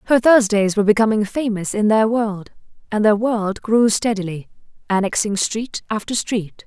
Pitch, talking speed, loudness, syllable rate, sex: 215 Hz, 155 wpm, -18 LUFS, 4.8 syllables/s, female